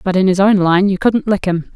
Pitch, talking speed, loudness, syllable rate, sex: 190 Hz, 305 wpm, -14 LUFS, 5.5 syllables/s, female